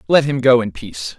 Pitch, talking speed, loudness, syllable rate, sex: 125 Hz, 255 wpm, -16 LUFS, 5.9 syllables/s, male